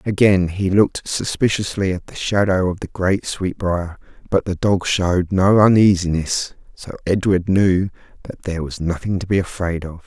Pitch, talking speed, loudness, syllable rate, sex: 95 Hz, 165 wpm, -19 LUFS, 4.8 syllables/s, male